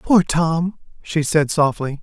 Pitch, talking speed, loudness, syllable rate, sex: 160 Hz, 150 wpm, -19 LUFS, 3.4 syllables/s, male